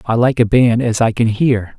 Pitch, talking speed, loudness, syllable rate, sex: 115 Hz, 270 wpm, -14 LUFS, 4.8 syllables/s, male